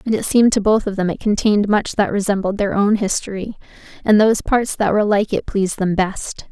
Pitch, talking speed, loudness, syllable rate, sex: 205 Hz, 230 wpm, -17 LUFS, 5.9 syllables/s, female